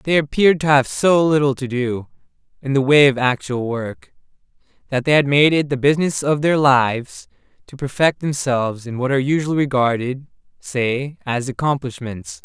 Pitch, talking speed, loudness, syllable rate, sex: 135 Hz, 170 wpm, -18 LUFS, 5.1 syllables/s, male